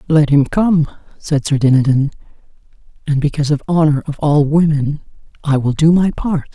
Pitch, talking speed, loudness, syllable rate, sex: 150 Hz, 165 wpm, -15 LUFS, 5.2 syllables/s, female